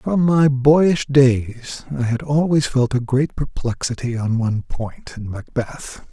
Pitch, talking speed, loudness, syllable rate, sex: 130 Hz, 155 wpm, -19 LUFS, 3.9 syllables/s, male